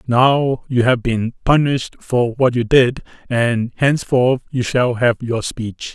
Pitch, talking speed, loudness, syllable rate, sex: 125 Hz, 160 wpm, -17 LUFS, 3.9 syllables/s, male